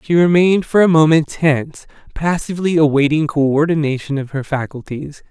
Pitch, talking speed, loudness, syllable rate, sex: 155 Hz, 135 wpm, -15 LUFS, 5.6 syllables/s, male